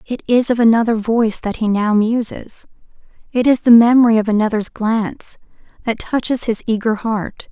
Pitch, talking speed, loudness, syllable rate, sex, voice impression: 225 Hz, 170 wpm, -16 LUFS, 5.2 syllables/s, female, feminine, adult-like, relaxed, bright, soft, clear, fluent, intellectual, calm, friendly, reassuring, elegant, kind, modest